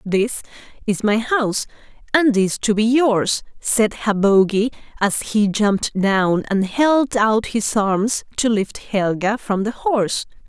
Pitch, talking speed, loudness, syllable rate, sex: 215 Hz, 150 wpm, -19 LUFS, 3.7 syllables/s, female